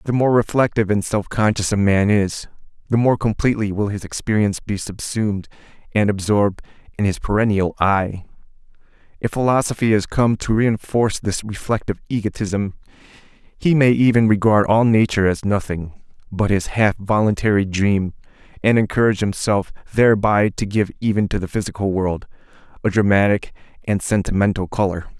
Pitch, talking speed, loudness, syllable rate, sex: 105 Hz, 145 wpm, -19 LUFS, 5.4 syllables/s, male